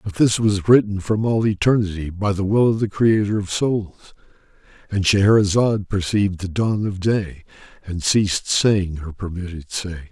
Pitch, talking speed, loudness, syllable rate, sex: 100 Hz, 160 wpm, -19 LUFS, 4.9 syllables/s, male